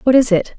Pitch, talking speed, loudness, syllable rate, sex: 235 Hz, 310 wpm, -14 LUFS, 6.4 syllables/s, female